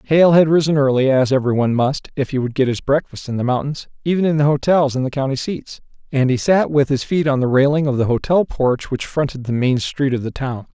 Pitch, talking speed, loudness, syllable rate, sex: 140 Hz, 250 wpm, -17 LUFS, 5.8 syllables/s, male